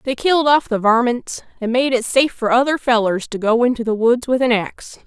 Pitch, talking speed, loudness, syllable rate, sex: 245 Hz, 235 wpm, -17 LUFS, 5.7 syllables/s, female